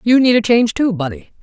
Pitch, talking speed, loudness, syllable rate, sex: 210 Hz, 250 wpm, -15 LUFS, 6.3 syllables/s, male